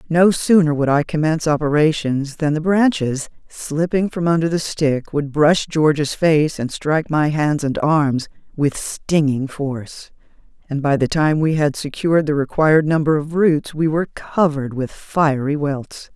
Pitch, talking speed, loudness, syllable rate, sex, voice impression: 150 Hz, 165 wpm, -18 LUFS, 4.5 syllables/s, female, very feminine, very middle-aged, slightly thin, tensed, powerful, bright, slightly soft, clear, fluent, slightly raspy, cool, intellectual, refreshing, very sincere, calm, mature, very friendly, very reassuring, unique, elegant, wild, sweet, very lively, kind, intense, slightly sharp